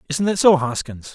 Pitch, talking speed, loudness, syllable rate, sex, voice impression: 155 Hz, 210 wpm, -18 LUFS, 5.3 syllables/s, male, very masculine, very adult-like, slightly old, very thick, tensed, very powerful, bright, slightly soft, clear, fluent, slightly raspy, very cool, intellectual, slightly refreshing, sincere, very calm, very mature, very friendly, very reassuring, very unique, elegant, wild, slightly sweet, lively, kind